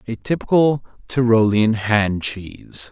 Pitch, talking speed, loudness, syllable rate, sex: 115 Hz, 105 wpm, -18 LUFS, 3.9 syllables/s, male